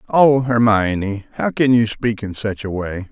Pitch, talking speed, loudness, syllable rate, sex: 110 Hz, 195 wpm, -18 LUFS, 4.3 syllables/s, male